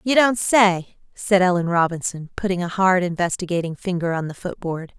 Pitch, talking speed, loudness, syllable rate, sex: 180 Hz, 180 wpm, -20 LUFS, 5.1 syllables/s, female